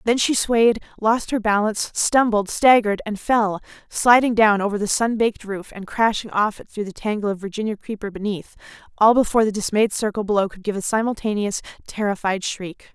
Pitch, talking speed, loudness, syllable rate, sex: 210 Hz, 180 wpm, -20 LUFS, 5.5 syllables/s, female